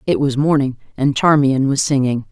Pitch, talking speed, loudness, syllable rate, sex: 135 Hz, 180 wpm, -16 LUFS, 5.1 syllables/s, female